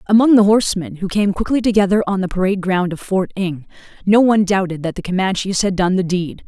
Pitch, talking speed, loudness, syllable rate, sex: 190 Hz, 220 wpm, -17 LUFS, 6.3 syllables/s, female